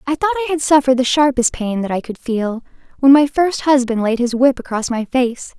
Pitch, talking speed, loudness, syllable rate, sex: 260 Hz, 235 wpm, -16 LUFS, 5.6 syllables/s, female